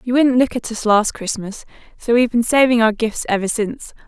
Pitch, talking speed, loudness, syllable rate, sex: 230 Hz, 220 wpm, -17 LUFS, 5.6 syllables/s, female